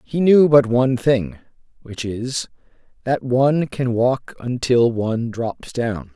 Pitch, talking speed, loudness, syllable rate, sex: 125 Hz, 145 wpm, -19 LUFS, 3.8 syllables/s, male